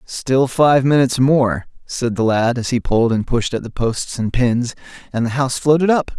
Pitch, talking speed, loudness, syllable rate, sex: 125 Hz, 215 wpm, -17 LUFS, 4.9 syllables/s, male